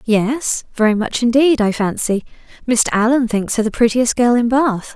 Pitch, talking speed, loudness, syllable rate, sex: 235 Hz, 180 wpm, -16 LUFS, 4.7 syllables/s, female